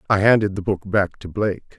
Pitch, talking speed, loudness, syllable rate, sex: 100 Hz, 235 wpm, -20 LUFS, 6.0 syllables/s, male